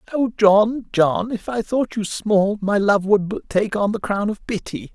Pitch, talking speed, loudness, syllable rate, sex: 210 Hz, 220 wpm, -20 LUFS, 4.3 syllables/s, male